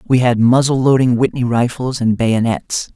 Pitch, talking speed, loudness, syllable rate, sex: 125 Hz, 160 wpm, -15 LUFS, 4.7 syllables/s, male